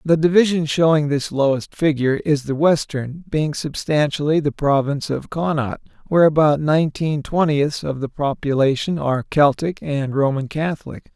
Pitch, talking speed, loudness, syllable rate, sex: 150 Hz, 145 wpm, -19 LUFS, 5.0 syllables/s, male